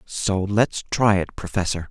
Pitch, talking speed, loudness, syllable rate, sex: 100 Hz, 155 wpm, -22 LUFS, 4.1 syllables/s, male